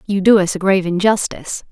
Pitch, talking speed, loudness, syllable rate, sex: 190 Hz, 210 wpm, -15 LUFS, 6.3 syllables/s, female